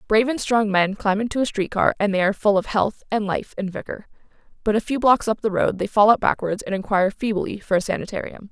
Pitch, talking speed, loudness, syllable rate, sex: 210 Hz, 255 wpm, -21 LUFS, 6.1 syllables/s, female